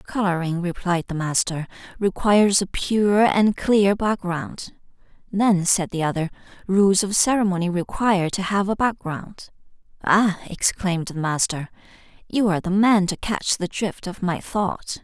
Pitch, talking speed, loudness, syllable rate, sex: 190 Hz, 150 wpm, -21 LUFS, 4.4 syllables/s, female